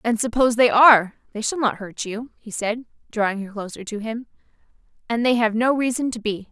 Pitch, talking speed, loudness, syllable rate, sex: 225 Hz, 210 wpm, -21 LUFS, 5.6 syllables/s, female